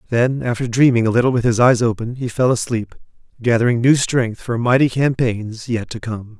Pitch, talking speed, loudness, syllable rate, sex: 120 Hz, 195 wpm, -17 LUFS, 5.3 syllables/s, male